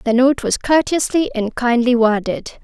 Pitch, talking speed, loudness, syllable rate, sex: 250 Hz, 160 wpm, -16 LUFS, 4.5 syllables/s, female